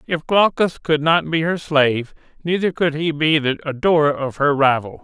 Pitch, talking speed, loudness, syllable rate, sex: 150 Hz, 190 wpm, -18 LUFS, 4.9 syllables/s, male